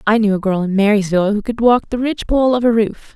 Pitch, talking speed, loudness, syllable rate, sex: 220 Hz, 265 wpm, -16 LUFS, 6.6 syllables/s, female